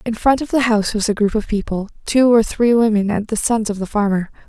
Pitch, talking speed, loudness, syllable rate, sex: 220 Hz, 270 wpm, -17 LUFS, 5.9 syllables/s, female